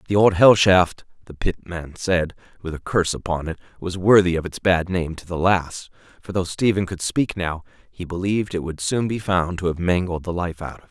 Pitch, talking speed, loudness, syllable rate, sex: 90 Hz, 230 wpm, -21 LUFS, 5.3 syllables/s, male